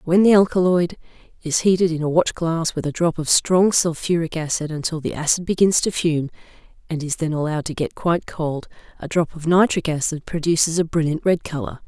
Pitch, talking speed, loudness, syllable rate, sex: 165 Hz, 195 wpm, -20 LUFS, 5.6 syllables/s, female